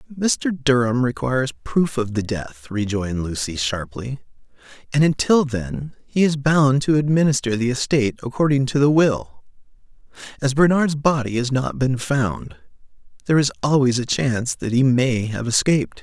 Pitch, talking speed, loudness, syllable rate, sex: 125 Hz, 155 wpm, -20 LUFS, 4.9 syllables/s, male